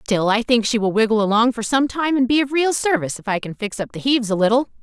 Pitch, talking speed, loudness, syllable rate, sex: 235 Hz, 300 wpm, -19 LUFS, 6.6 syllables/s, female